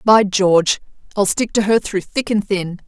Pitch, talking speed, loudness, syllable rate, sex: 200 Hz, 210 wpm, -17 LUFS, 4.6 syllables/s, female